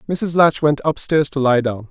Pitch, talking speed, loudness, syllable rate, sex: 145 Hz, 220 wpm, -17 LUFS, 4.7 syllables/s, male